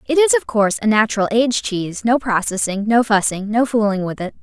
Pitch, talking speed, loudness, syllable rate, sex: 220 Hz, 215 wpm, -17 LUFS, 6.1 syllables/s, female